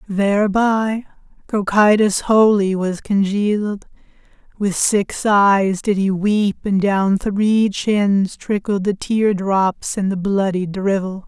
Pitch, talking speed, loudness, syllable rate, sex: 200 Hz, 120 wpm, -17 LUFS, 3.4 syllables/s, female